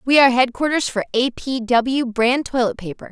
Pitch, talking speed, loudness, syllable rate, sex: 250 Hz, 190 wpm, -18 LUFS, 5.2 syllables/s, female